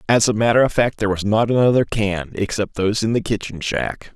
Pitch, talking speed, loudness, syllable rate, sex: 110 Hz, 230 wpm, -19 LUFS, 5.8 syllables/s, male